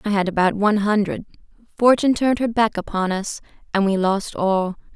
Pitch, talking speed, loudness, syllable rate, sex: 205 Hz, 180 wpm, -20 LUFS, 5.7 syllables/s, female